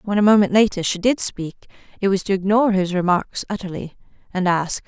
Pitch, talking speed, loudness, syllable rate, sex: 195 Hz, 195 wpm, -19 LUFS, 6.1 syllables/s, female